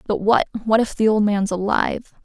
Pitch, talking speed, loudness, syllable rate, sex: 210 Hz, 215 wpm, -19 LUFS, 5.6 syllables/s, female